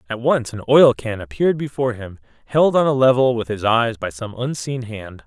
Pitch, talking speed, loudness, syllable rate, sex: 120 Hz, 215 wpm, -18 LUFS, 5.3 syllables/s, male